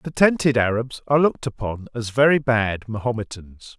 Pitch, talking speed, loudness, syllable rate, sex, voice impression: 120 Hz, 160 wpm, -21 LUFS, 5.2 syllables/s, male, very masculine, very adult-like, middle-aged, very thick, slightly tensed, slightly powerful, slightly bright, slightly soft, slightly clear, slightly fluent, slightly cool, slightly intellectual, slightly refreshing, sincere, calm, mature, slightly friendly, reassuring, wild, slightly lively, kind